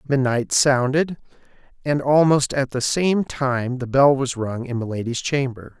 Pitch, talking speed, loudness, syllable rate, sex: 130 Hz, 155 wpm, -20 LUFS, 4.3 syllables/s, male